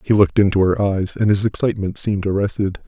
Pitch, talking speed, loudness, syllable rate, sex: 100 Hz, 210 wpm, -18 LUFS, 6.5 syllables/s, male